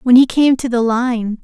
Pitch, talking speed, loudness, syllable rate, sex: 245 Hz, 250 wpm, -14 LUFS, 4.5 syllables/s, female